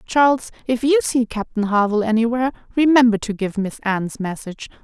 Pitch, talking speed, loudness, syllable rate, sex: 230 Hz, 160 wpm, -19 LUFS, 6.0 syllables/s, female